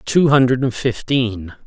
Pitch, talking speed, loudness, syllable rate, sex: 125 Hz, 110 wpm, -17 LUFS, 3.4 syllables/s, male